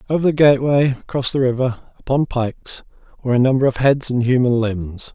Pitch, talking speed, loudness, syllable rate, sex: 130 Hz, 185 wpm, -17 LUFS, 5.9 syllables/s, male